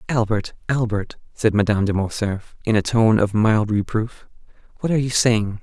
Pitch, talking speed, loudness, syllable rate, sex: 110 Hz, 170 wpm, -20 LUFS, 5.0 syllables/s, male